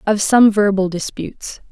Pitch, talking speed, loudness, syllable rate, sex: 205 Hz, 140 wpm, -15 LUFS, 4.6 syllables/s, female